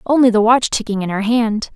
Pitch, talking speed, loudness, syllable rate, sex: 225 Hz, 240 wpm, -15 LUFS, 5.6 syllables/s, female